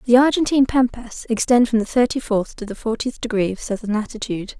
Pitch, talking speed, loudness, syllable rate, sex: 230 Hz, 195 wpm, -20 LUFS, 6.1 syllables/s, female